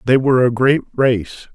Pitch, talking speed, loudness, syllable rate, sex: 125 Hz, 195 wpm, -15 LUFS, 4.3 syllables/s, male